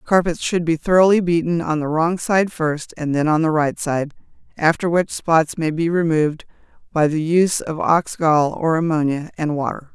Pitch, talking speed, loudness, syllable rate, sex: 160 Hz, 195 wpm, -19 LUFS, 4.8 syllables/s, female